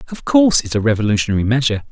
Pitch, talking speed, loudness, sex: 125 Hz, 220 wpm, -16 LUFS, male